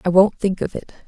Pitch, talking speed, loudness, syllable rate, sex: 190 Hz, 280 wpm, -19 LUFS, 5.9 syllables/s, female